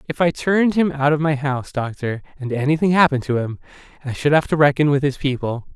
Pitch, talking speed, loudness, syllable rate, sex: 145 Hz, 230 wpm, -19 LUFS, 6.3 syllables/s, male